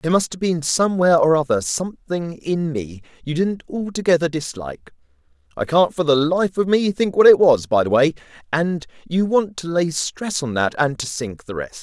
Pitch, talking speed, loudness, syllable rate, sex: 160 Hz, 205 wpm, -19 LUFS, 5.2 syllables/s, male